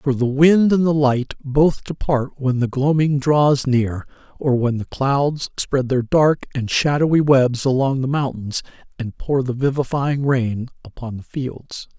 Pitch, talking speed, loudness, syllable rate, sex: 135 Hz, 170 wpm, -19 LUFS, 4.1 syllables/s, male